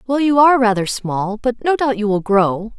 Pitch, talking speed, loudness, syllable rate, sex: 230 Hz, 215 wpm, -16 LUFS, 5.1 syllables/s, female